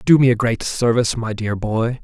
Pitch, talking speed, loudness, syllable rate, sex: 115 Hz, 235 wpm, -18 LUFS, 5.2 syllables/s, male